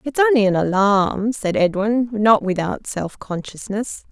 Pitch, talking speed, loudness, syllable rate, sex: 210 Hz, 145 wpm, -19 LUFS, 4.1 syllables/s, female